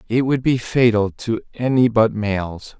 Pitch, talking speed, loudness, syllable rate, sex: 115 Hz, 170 wpm, -18 LUFS, 4.0 syllables/s, male